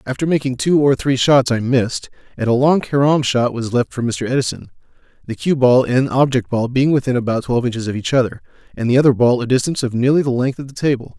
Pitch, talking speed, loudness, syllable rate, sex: 130 Hz, 240 wpm, -17 LUFS, 6.3 syllables/s, male